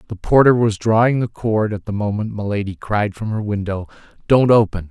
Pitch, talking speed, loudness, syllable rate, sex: 105 Hz, 195 wpm, -18 LUFS, 5.3 syllables/s, male